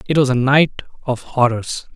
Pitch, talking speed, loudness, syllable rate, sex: 130 Hz, 185 wpm, -17 LUFS, 4.8 syllables/s, male